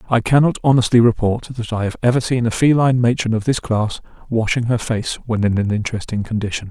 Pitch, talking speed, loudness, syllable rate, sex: 115 Hz, 205 wpm, -18 LUFS, 6.2 syllables/s, male